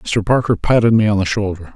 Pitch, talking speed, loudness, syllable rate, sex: 105 Hz, 240 wpm, -16 LUFS, 5.9 syllables/s, male